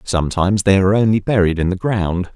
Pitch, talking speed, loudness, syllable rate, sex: 95 Hz, 205 wpm, -16 LUFS, 6.2 syllables/s, male